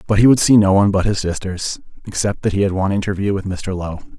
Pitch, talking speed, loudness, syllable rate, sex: 100 Hz, 245 wpm, -17 LUFS, 6.8 syllables/s, male